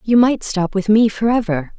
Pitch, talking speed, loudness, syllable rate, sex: 210 Hz, 235 wpm, -16 LUFS, 4.8 syllables/s, female